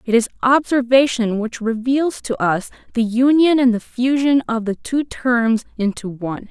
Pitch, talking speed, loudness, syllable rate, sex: 240 Hz, 165 wpm, -18 LUFS, 4.4 syllables/s, female